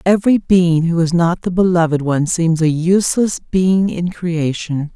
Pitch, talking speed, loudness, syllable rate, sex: 175 Hz, 170 wpm, -15 LUFS, 4.6 syllables/s, female